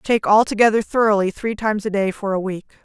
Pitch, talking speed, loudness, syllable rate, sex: 205 Hz, 230 wpm, -18 LUFS, 6.7 syllables/s, female